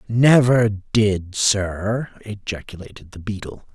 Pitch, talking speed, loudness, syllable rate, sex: 105 Hz, 95 wpm, -19 LUFS, 3.5 syllables/s, male